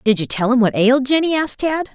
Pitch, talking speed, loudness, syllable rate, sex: 255 Hz, 275 wpm, -16 LUFS, 6.6 syllables/s, female